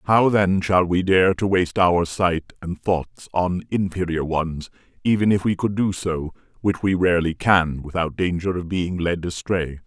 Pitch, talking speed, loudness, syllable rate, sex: 90 Hz, 180 wpm, -21 LUFS, 4.4 syllables/s, male